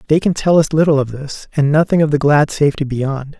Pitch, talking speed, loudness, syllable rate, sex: 150 Hz, 250 wpm, -15 LUFS, 5.8 syllables/s, male